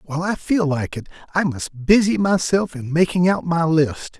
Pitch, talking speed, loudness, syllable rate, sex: 165 Hz, 200 wpm, -19 LUFS, 4.7 syllables/s, male